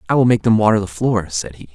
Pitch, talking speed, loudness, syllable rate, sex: 100 Hz, 310 wpm, -16 LUFS, 6.8 syllables/s, male